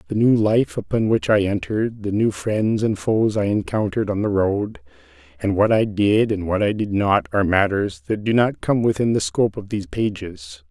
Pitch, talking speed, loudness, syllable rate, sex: 105 Hz, 215 wpm, -20 LUFS, 5.1 syllables/s, male